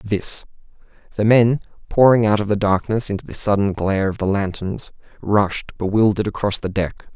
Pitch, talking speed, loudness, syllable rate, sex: 105 Hz, 160 wpm, -19 LUFS, 5.2 syllables/s, male